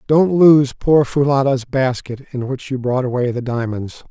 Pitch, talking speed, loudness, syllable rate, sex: 130 Hz, 175 wpm, -17 LUFS, 4.4 syllables/s, male